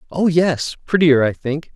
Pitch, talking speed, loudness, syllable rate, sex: 155 Hz, 135 wpm, -17 LUFS, 4.2 syllables/s, male